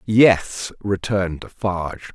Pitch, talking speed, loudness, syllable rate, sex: 95 Hz, 85 wpm, -21 LUFS, 3.9 syllables/s, male